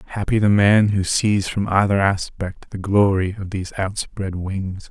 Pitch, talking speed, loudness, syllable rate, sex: 100 Hz, 170 wpm, -20 LUFS, 4.4 syllables/s, male